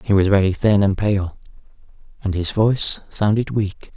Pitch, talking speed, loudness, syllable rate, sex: 100 Hz, 165 wpm, -19 LUFS, 4.8 syllables/s, male